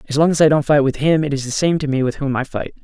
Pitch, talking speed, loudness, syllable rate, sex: 145 Hz, 380 wpm, -17 LUFS, 7.0 syllables/s, male